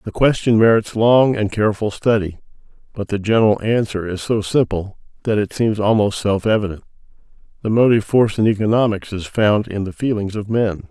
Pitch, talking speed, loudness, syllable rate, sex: 105 Hz, 175 wpm, -17 LUFS, 5.6 syllables/s, male